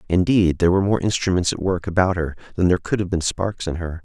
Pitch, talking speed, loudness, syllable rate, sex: 90 Hz, 250 wpm, -20 LUFS, 6.6 syllables/s, male